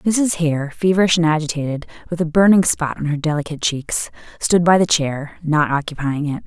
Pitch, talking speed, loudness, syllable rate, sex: 160 Hz, 185 wpm, -18 LUFS, 5.3 syllables/s, female